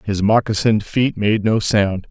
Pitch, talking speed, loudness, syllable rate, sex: 105 Hz, 170 wpm, -17 LUFS, 4.5 syllables/s, male